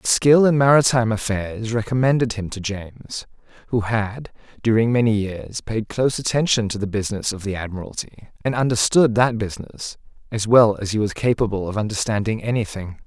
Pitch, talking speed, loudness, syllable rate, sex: 110 Hz, 165 wpm, -20 LUFS, 5.6 syllables/s, male